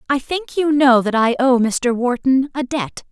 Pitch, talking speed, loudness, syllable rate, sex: 260 Hz, 210 wpm, -17 LUFS, 4.3 syllables/s, female